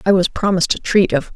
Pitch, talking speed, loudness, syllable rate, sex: 185 Hz, 265 wpm, -16 LUFS, 6.7 syllables/s, female